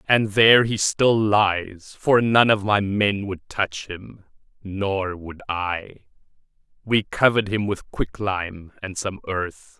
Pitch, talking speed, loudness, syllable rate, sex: 100 Hz, 145 wpm, -21 LUFS, 3.6 syllables/s, male